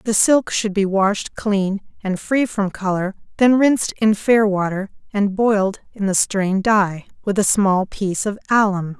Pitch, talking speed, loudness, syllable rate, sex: 200 Hz, 180 wpm, -18 LUFS, 4.4 syllables/s, female